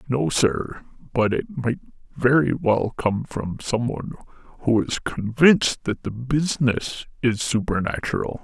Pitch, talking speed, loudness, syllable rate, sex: 125 Hz, 130 wpm, -22 LUFS, 4.3 syllables/s, male